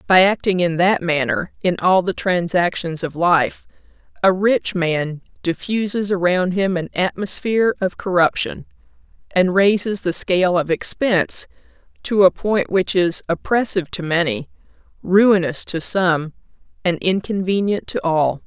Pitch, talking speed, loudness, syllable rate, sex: 185 Hz, 135 wpm, -18 LUFS, 4.4 syllables/s, female